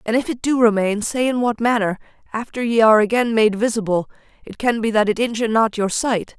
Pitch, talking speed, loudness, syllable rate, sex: 225 Hz, 225 wpm, -18 LUFS, 5.9 syllables/s, female